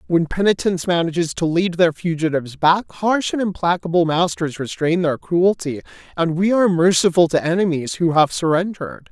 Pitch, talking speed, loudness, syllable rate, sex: 175 Hz, 160 wpm, -18 LUFS, 5.4 syllables/s, male